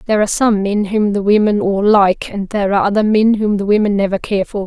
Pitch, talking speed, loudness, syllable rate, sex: 205 Hz, 255 wpm, -14 LUFS, 6.1 syllables/s, female